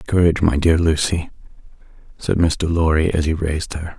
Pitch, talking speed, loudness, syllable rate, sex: 80 Hz, 165 wpm, -19 LUFS, 5.4 syllables/s, male